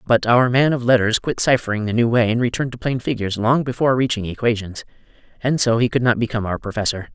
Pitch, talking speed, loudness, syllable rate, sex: 120 Hz, 225 wpm, -19 LUFS, 6.7 syllables/s, male